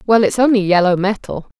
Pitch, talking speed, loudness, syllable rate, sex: 205 Hz, 190 wpm, -15 LUFS, 5.8 syllables/s, female